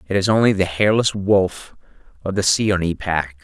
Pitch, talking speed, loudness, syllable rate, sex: 95 Hz, 175 wpm, -18 LUFS, 4.7 syllables/s, male